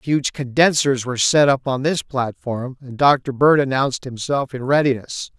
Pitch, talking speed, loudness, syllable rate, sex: 135 Hz, 165 wpm, -19 LUFS, 4.6 syllables/s, male